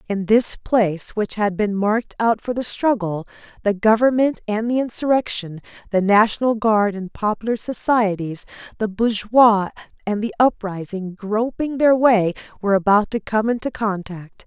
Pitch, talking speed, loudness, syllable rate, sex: 215 Hz, 150 wpm, -19 LUFS, 4.7 syllables/s, female